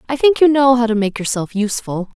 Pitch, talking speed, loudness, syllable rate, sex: 235 Hz, 245 wpm, -16 LUFS, 6.2 syllables/s, female